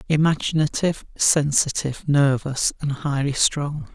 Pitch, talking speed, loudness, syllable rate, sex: 145 Hz, 90 wpm, -21 LUFS, 4.5 syllables/s, male